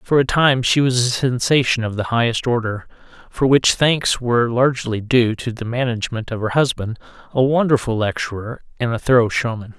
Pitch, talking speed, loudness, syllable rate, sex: 120 Hz, 185 wpm, -18 LUFS, 5.4 syllables/s, male